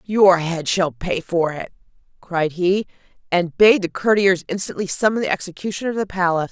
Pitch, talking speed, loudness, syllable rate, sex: 185 Hz, 175 wpm, -19 LUFS, 5.3 syllables/s, female